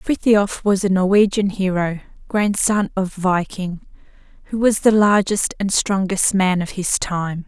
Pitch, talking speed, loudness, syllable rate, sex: 195 Hz, 145 wpm, -18 LUFS, 4.0 syllables/s, female